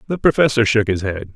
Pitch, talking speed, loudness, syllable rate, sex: 120 Hz, 220 wpm, -17 LUFS, 6.1 syllables/s, male